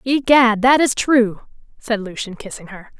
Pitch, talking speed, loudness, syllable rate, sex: 230 Hz, 160 wpm, -16 LUFS, 4.5 syllables/s, female